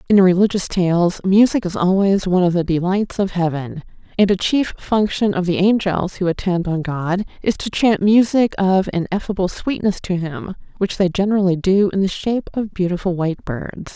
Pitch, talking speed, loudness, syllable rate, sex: 190 Hz, 190 wpm, -18 LUFS, 5.2 syllables/s, female